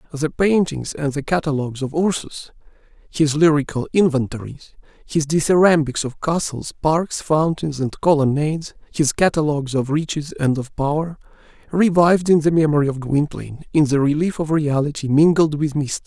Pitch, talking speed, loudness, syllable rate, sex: 150 Hz, 145 wpm, -19 LUFS, 5.2 syllables/s, male